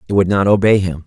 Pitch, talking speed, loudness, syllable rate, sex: 95 Hz, 280 wpm, -14 LUFS, 6.7 syllables/s, male